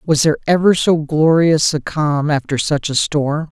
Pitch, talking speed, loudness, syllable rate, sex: 155 Hz, 185 wpm, -15 LUFS, 4.6 syllables/s, male